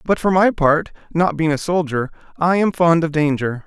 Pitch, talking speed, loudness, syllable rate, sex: 160 Hz, 215 wpm, -18 LUFS, 4.8 syllables/s, male